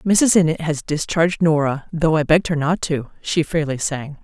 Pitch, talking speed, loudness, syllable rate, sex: 160 Hz, 200 wpm, -19 LUFS, 5.0 syllables/s, female